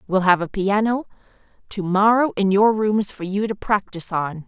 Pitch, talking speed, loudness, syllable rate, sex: 200 Hz, 175 wpm, -20 LUFS, 4.9 syllables/s, female